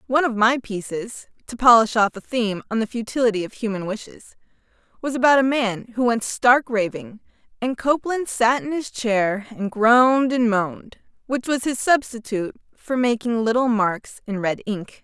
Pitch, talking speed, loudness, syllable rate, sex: 235 Hz, 175 wpm, -21 LUFS, 3.9 syllables/s, female